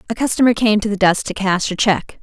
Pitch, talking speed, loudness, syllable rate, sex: 205 Hz, 270 wpm, -16 LUFS, 6.4 syllables/s, female